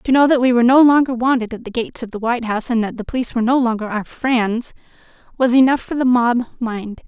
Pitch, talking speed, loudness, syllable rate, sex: 240 Hz, 255 wpm, -17 LUFS, 6.6 syllables/s, female